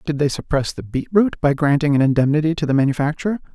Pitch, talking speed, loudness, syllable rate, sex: 150 Hz, 220 wpm, -19 LUFS, 6.7 syllables/s, male